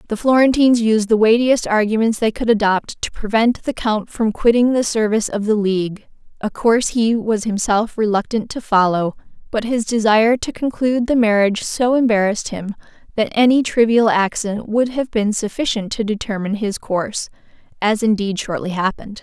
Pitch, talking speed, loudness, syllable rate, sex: 220 Hz, 170 wpm, -17 LUFS, 5.4 syllables/s, female